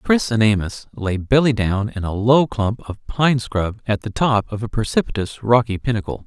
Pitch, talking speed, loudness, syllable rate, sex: 110 Hz, 200 wpm, -19 LUFS, 4.8 syllables/s, male